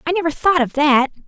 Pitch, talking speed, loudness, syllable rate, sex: 305 Hz, 235 wpm, -16 LUFS, 6.1 syllables/s, female